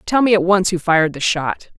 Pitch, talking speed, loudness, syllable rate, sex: 180 Hz, 270 wpm, -16 LUFS, 5.6 syllables/s, female